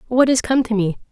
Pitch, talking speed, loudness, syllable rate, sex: 230 Hz, 270 wpm, -17 LUFS, 6.0 syllables/s, female